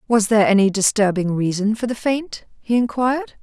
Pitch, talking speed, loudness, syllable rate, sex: 220 Hz, 175 wpm, -18 LUFS, 5.5 syllables/s, female